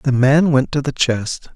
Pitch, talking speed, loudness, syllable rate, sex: 135 Hz, 230 wpm, -16 LUFS, 4.1 syllables/s, male